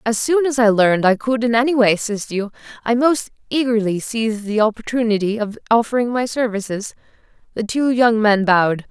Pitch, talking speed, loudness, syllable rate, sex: 225 Hz, 180 wpm, -18 LUFS, 5.5 syllables/s, female